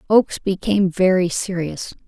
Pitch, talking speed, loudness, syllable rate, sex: 185 Hz, 115 wpm, -19 LUFS, 5.0 syllables/s, female